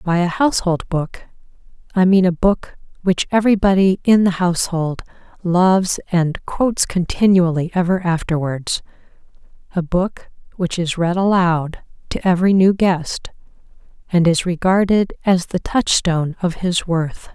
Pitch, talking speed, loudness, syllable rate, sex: 180 Hz, 130 wpm, -17 LUFS, 4.6 syllables/s, female